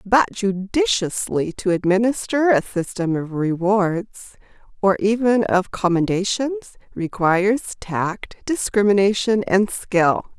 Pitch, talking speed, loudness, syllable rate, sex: 200 Hz, 100 wpm, -20 LUFS, 4.0 syllables/s, female